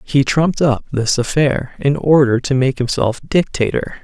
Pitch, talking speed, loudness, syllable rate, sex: 135 Hz, 165 wpm, -16 LUFS, 4.5 syllables/s, male